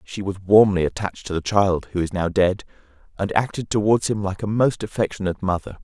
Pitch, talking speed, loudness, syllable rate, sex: 100 Hz, 205 wpm, -21 LUFS, 5.8 syllables/s, male